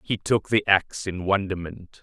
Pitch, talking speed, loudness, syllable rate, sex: 95 Hz, 180 wpm, -23 LUFS, 4.2 syllables/s, male